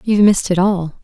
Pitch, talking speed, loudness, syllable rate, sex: 190 Hz, 235 wpm, -14 LUFS, 6.9 syllables/s, female